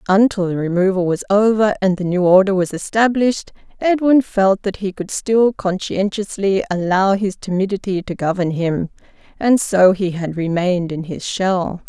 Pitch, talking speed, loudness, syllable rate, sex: 195 Hz, 160 wpm, -17 LUFS, 4.8 syllables/s, female